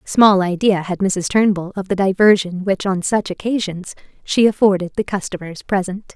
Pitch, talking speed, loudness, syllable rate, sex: 195 Hz, 165 wpm, -17 LUFS, 4.9 syllables/s, female